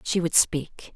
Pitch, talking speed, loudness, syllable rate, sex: 170 Hz, 190 wpm, -22 LUFS, 3.5 syllables/s, female